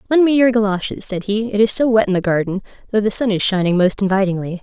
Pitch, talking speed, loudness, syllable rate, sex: 205 Hz, 260 wpm, -17 LUFS, 6.6 syllables/s, female